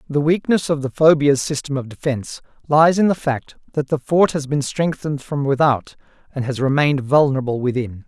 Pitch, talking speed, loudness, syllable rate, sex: 140 Hz, 185 wpm, -19 LUFS, 5.5 syllables/s, male